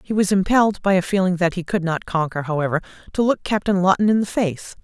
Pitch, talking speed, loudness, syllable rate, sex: 185 Hz, 235 wpm, -20 LUFS, 6.2 syllables/s, female